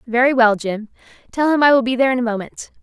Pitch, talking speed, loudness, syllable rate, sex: 245 Hz, 255 wpm, -16 LUFS, 6.8 syllables/s, female